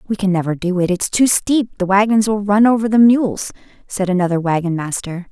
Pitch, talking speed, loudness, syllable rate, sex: 200 Hz, 215 wpm, -16 LUFS, 5.4 syllables/s, female